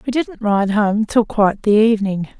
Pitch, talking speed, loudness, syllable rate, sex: 215 Hz, 200 wpm, -16 LUFS, 5.0 syllables/s, female